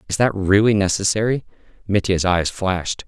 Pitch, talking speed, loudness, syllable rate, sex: 100 Hz, 135 wpm, -19 LUFS, 5.3 syllables/s, male